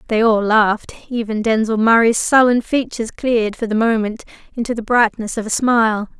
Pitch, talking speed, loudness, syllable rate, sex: 225 Hz, 165 wpm, -16 LUFS, 5.4 syllables/s, female